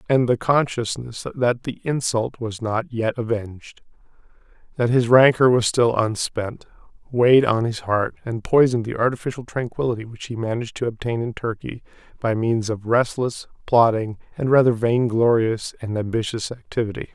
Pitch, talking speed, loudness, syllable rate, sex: 115 Hz, 150 wpm, -21 LUFS, 5.0 syllables/s, male